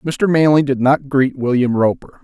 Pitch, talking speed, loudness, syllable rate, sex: 135 Hz, 190 wpm, -15 LUFS, 4.6 syllables/s, male